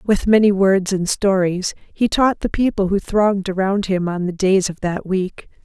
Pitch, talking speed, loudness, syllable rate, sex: 195 Hz, 200 wpm, -18 LUFS, 4.4 syllables/s, female